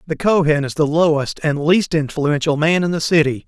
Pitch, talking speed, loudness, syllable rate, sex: 155 Hz, 205 wpm, -17 LUFS, 5.1 syllables/s, male